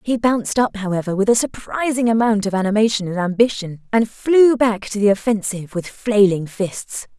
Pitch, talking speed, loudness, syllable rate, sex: 215 Hz, 175 wpm, -18 LUFS, 5.2 syllables/s, female